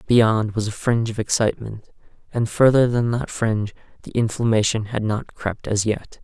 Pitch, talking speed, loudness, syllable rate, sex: 110 Hz, 175 wpm, -21 LUFS, 5.1 syllables/s, male